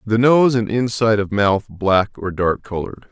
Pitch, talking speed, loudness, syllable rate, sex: 105 Hz, 190 wpm, -18 LUFS, 4.7 syllables/s, male